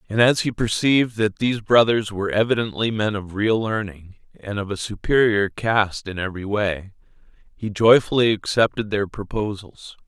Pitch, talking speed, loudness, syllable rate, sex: 105 Hz, 155 wpm, -21 LUFS, 5.0 syllables/s, male